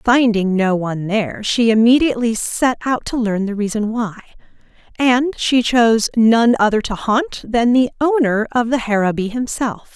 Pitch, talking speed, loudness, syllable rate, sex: 230 Hz, 165 wpm, -16 LUFS, 4.7 syllables/s, female